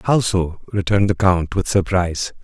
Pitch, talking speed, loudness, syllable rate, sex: 95 Hz, 175 wpm, -19 LUFS, 5.1 syllables/s, male